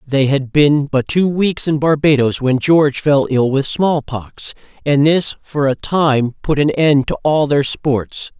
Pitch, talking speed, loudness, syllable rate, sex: 140 Hz, 205 wpm, -15 LUFS, 3.9 syllables/s, male